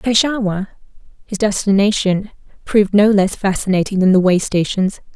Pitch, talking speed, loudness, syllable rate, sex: 200 Hz, 130 wpm, -16 LUFS, 5.0 syllables/s, female